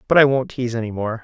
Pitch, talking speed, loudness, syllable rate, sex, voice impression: 120 Hz, 295 wpm, -19 LUFS, 7.5 syllables/s, male, masculine, adult-like, slightly refreshing, slightly sincere, friendly, kind